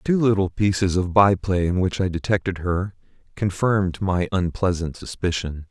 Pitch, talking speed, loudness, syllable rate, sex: 95 Hz, 160 wpm, -22 LUFS, 4.9 syllables/s, male